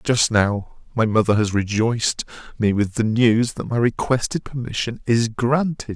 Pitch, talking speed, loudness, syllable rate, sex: 115 Hz, 160 wpm, -20 LUFS, 4.4 syllables/s, male